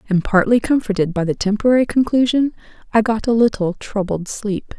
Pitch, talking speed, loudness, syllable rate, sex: 215 Hz, 165 wpm, -18 LUFS, 5.4 syllables/s, female